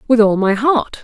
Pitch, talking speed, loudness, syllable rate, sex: 230 Hz, 230 wpm, -14 LUFS, 4.8 syllables/s, female